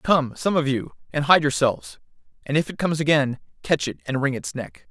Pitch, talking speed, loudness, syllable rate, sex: 145 Hz, 220 wpm, -22 LUFS, 5.5 syllables/s, male